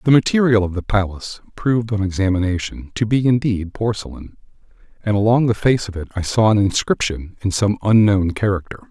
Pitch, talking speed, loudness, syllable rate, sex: 105 Hz, 175 wpm, -18 LUFS, 5.7 syllables/s, male